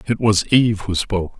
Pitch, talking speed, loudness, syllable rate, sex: 100 Hz, 215 wpm, -18 LUFS, 5.8 syllables/s, male